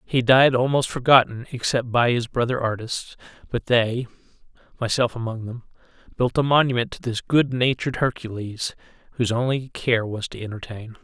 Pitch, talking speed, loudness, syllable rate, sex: 120 Hz, 145 wpm, -22 LUFS, 5.0 syllables/s, male